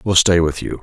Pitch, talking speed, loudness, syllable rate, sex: 85 Hz, 365 wpm, -15 LUFS, 7.0 syllables/s, male